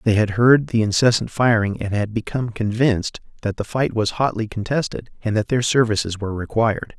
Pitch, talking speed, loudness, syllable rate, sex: 110 Hz, 190 wpm, -20 LUFS, 5.7 syllables/s, male